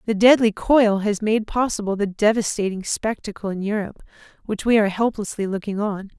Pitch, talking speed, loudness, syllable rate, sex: 210 Hz, 165 wpm, -21 LUFS, 5.6 syllables/s, female